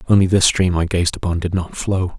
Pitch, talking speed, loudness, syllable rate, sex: 90 Hz, 245 wpm, -18 LUFS, 5.6 syllables/s, male